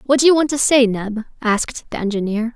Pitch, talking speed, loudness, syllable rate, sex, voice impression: 240 Hz, 235 wpm, -17 LUFS, 5.7 syllables/s, female, very feminine, young, slightly thin, very tensed, very powerful, slightly bright, slightly soft, very clear, fluent, cool, intellectual, very refreshing, very sincere, calm, very friendly, reassuring, unique, slightly elegant, wild, slightly sweet, lively, slightly kind, slightly intense, modest, slightly light